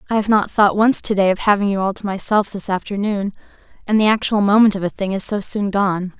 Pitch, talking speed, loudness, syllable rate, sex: 200 Hz, 240 wpm, -17 LUFS, 5.9 syllables/s, female